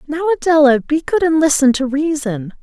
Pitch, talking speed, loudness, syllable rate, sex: 290 Hz, 185 wpm, -15 LUFS, 5.7 syllables/s, female